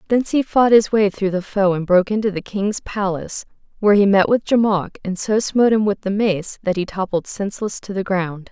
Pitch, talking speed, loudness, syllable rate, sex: 200 Hz, 235 wpm, -18 LUFS, 5.6 syllables/s, female